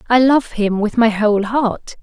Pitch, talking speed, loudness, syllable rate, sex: 225 Hz, 205 wpm, -16 LUFS, 4.5 syllables/s, female